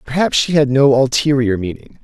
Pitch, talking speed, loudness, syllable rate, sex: 135 Hz, 175 wpm, -14 LUFS, 5.2 syllables/s, male